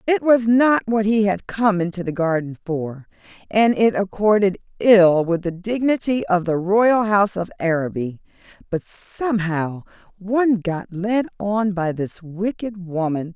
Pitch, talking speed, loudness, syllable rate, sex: 195 Hz, 155 wpm, -20 LUFS, 4.3 syllables/s, female